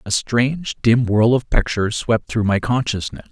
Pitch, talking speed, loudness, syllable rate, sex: 115 Hz, 180 wpm, -19 LUFS, 4.7 syllables/s, male